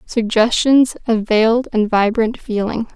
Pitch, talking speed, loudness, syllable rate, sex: 225 Hz, 120 wpm, -16 LUFS, 4.2 syllables/s, female